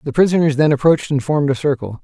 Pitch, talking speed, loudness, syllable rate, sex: 145 Hz, 235 wpm, -16 LUFS, 7.3 syllables/s, male